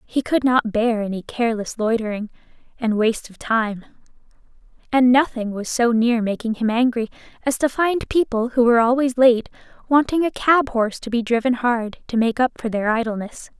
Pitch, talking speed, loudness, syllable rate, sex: 235 Hz, 180 wpm, -20 LUFS, 5.2 syllables/s, female